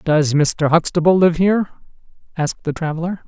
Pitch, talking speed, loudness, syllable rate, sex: 165 Hz, 145 wpm, -17 LUFS, 5.8 syllables/s, female